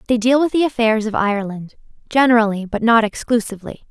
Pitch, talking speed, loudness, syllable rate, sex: 225 Hz, 155 wpm, -17 LUFS, 6.2 syllables/s, female